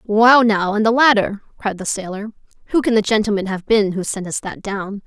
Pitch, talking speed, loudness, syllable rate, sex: 210 Hz, 225 wpm, -17 LUFS, 5.2 syllables/s, female